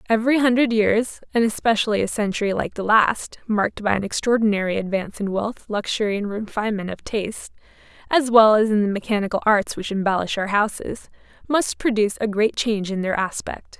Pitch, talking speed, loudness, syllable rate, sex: 215 Hz, 180 wpm, -21 LUFS, 5.8 syllables/s, female